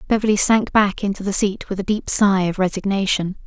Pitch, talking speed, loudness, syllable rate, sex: 200 Hz, 210 wpm, -19 LUFS, 5.6 syllables/s, female